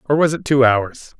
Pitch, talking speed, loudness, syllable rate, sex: 135 Hz, 250 wpm, -16 LUFS, 4.8 syllables/s, male